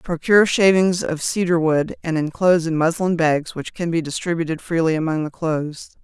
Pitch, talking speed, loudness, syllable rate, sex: 165 Hz, 180 wpm, -19 LUFS, 5.4 syllables/s, female